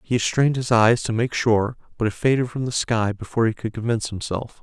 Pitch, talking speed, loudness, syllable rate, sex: 115 Hz, 245 wpm, -22 LUFS, 6.0 syllables/s, male